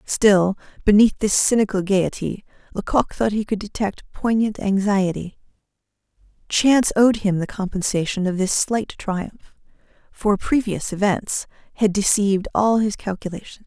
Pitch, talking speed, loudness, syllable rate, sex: 205 Hz, 125 wpm, -20 LUFS, 4.6 syllables/s, female